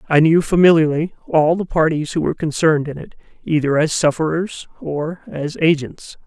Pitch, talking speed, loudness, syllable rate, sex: 155 Hz, 165 wpm, -17 LUFS, 5.2 syllables/s, male